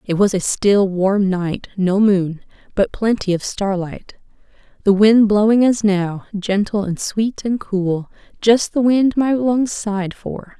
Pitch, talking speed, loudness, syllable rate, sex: 205 Hz, 165 wpm, -17 LUFS, 3.8 syllables/s, female